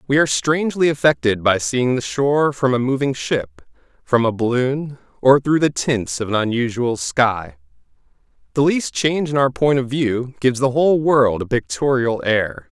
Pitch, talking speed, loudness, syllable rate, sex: 130 Hz, 180 wpm, -18 LUFS, 4.9 syllables/s, male